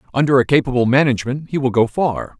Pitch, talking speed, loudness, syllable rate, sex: 130 Hz, 200 wpm, -17 LUFS, 6.7 syllables/s, male